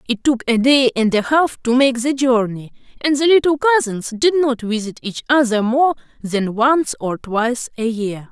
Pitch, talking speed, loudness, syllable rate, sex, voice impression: 245 Hz, 195 wpm, -17 LUFS, 5.0 syllables/s, female, feminine, adult-like, clear, fluent, slightly intellectual, slightly friendly, lively